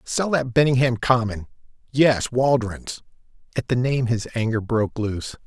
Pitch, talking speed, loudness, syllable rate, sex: 120 Hz, 130 wpm, -22 LUFS, 4.7 syllables/s, male